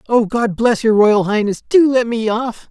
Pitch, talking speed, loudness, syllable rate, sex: 225 Hz, 220 wpm, -15 LUFS, 4.4 syllables/s, male